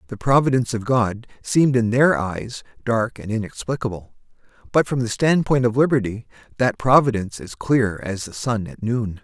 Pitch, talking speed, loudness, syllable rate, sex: 115 Hz, 175 wpm, -20 LUFS, 5.1 syllables/s, male